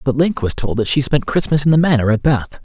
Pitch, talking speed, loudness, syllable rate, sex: 135 Hz, 295 wpm, -16 LUFS, 6.0 syllables/s, male